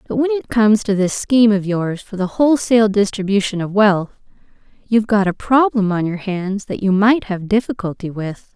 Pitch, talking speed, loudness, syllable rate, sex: 205 Hz, 190 wpm, -17 LUFS, 5.4 syllables/s, female